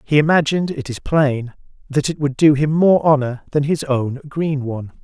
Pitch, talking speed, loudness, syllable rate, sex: 145 Hz, 200 wpm, -18 LUFS, 4.9 syllables/s, male